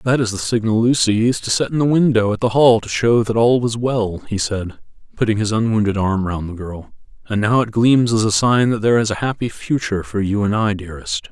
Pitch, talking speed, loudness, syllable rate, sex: 110 Hz, 250 wpm, -17 LUFS, 5.7 syllables/s, male